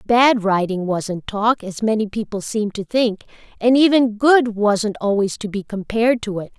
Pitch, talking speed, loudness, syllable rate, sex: 215 Hz, 180 wpm, -18 LUFS, 4.6 syllables/s, female